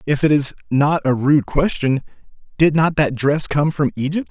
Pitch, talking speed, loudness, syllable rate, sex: 145 Hz, 195 wpm, -17 LUFS, 4.7 syllables/s, male